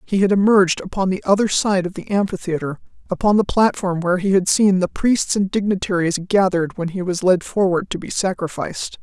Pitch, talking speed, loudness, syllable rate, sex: 190 Hz, 200 wpm, -19 LUFS, 5.8 syllables/s, female